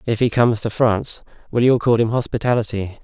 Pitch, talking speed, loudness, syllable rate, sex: 115 Hz, 200 wpm, -18 LUFS, 6.5 syllables/s, male